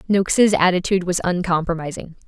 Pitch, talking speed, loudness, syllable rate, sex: 180 Hz, 105 wpm, -19 LUFS, 6.0 syllables/s, female